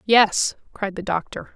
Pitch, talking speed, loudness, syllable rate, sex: 200 Hz, 155 wpm, -22 LUFS, 3.9 syllables/s, female